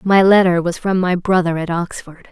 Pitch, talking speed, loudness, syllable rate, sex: 180 Hz, 210 wpm, -15 LUFS, 5.0 syllables/s, female